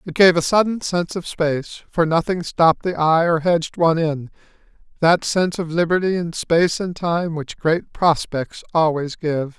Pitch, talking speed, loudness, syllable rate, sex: 165 Hz, 175 wpm, -19 LUFS, 4.9 syllables/s, male